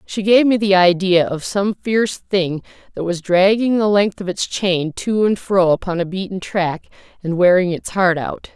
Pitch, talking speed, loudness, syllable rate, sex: 190 Hz, 205 wpm, -17 LUFS, 4.6 syllables/s, female